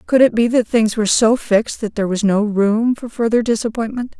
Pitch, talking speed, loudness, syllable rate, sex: 225 Hz, 230 wpm, -16 LUFS, 5.7 syllables/s, female